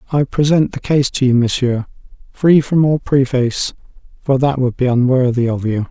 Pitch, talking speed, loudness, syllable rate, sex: 130 Hz, 185 wpm, -15 LUFS, 5.0 syllables/s, male